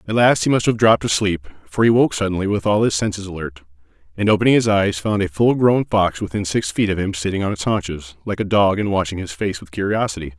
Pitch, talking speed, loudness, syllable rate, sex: 95 Hz, 250 wpm, -18 LUFS, 6.1 syllables/s, male